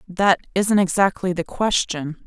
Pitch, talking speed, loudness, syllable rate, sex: 185 Hz, 135 wpm, -20 LUFS, 4.0 syllables/s, female